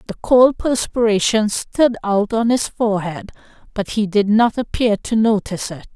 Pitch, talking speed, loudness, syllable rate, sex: 215 Hz, 160 wpm, -17 LUFS, 4.6 syllables/s, female